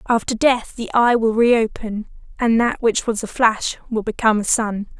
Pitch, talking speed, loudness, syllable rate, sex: 225 Hz, 190 wpm, -19 LUFS, 4.7 syllables/s, female